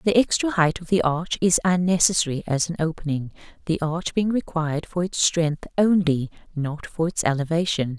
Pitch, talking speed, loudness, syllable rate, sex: 165 Hz, 175 wpm, -23 LUFS, 5.2 syllables/s, female